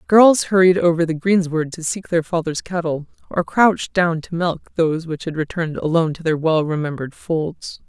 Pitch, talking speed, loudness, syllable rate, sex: 165 Hz, 190 wpm, -19 LUFS, 5.3 syllables/s, female